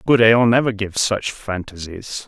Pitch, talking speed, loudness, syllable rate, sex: 110 Hz, 160 wpm, -18 LUFS, 5.2 syllables/s, male